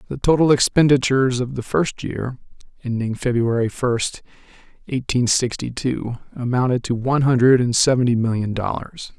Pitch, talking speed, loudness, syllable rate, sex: 125 Hz, 135 wpm, -19 LUFS, 5.1 syllables/s, male